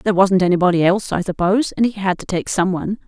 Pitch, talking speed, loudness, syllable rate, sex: 190 Hz, 255 wpm, -17 LUFS, 7.1 syllables/s, female